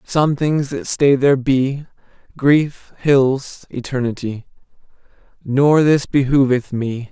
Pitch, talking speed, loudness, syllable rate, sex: 135 Hz, 110 wpm, -17 LUFS, 3.5 syllables/s, male